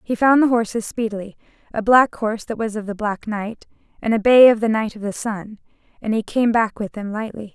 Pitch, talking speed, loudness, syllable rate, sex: 220 Hz, 240 wpm, -19 LUFS, 5.5 syllables/s, female